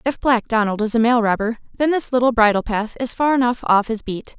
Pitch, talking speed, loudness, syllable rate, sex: 235 Hz, 245 wpm, -18 LUFS, 5.7 syllables/s, female